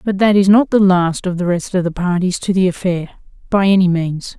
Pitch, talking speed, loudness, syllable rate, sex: 185 Hz, 245 wpm, -15 LUFS, 5.3 syllables/s, female